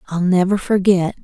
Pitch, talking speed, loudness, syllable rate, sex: 185 Hz, 145 wpm, -16 LUFS, 5.2 syllables/s, female